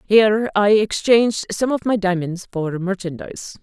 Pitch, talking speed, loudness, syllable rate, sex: 200 Hz, 150 wpm, -19 LUFS, 4.8 syllables/s, female